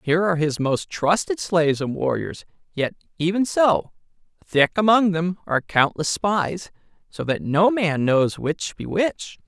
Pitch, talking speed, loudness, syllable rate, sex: 170 Hz, 160 wpm, -21 LUFS, 4.4 syllables/s, male